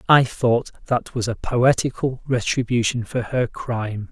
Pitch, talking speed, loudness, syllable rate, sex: 120 Hz, 145 wpm, -21 LUFS, 4.4 syllables/s, male